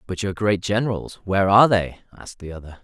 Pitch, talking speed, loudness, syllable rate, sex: 100 Hz, 190 wpm, -20 LUFS, 6.5 syllables/s, male